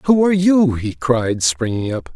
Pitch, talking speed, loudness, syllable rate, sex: 135 Hz, 195 wpm, -17 LUFS, 4.3 syllables/s, male